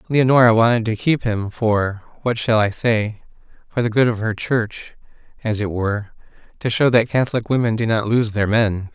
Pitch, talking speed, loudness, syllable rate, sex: 110 Hz, 180 wpm, -19 LUFS, 5.1 syllables/s, male